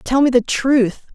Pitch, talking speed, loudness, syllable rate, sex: 250 Hz, 210 wpm, -16 LUFS, 3.8 syllables/s, female